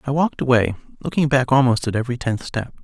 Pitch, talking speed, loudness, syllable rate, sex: 125 Hz, 210 wpm, -20 LUFS, 6.7 syllables/s, male